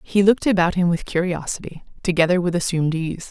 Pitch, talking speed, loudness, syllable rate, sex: 175 Hz, 180 wpm, -20 LUFS, 6.3 syllables/s, female